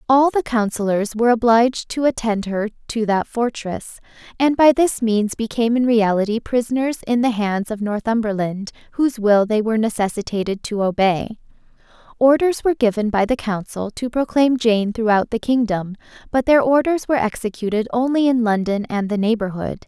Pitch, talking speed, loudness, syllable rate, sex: 225 Hz, 165 wpm, -19 LUFS, 5.4 syllables/s, female